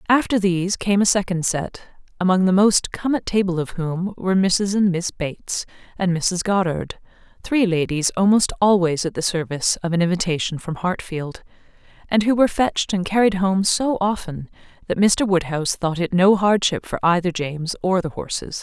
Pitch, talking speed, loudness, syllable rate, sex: 185 Hz, 180 wpm, -20 LUFS, 5.2 syllables/s, female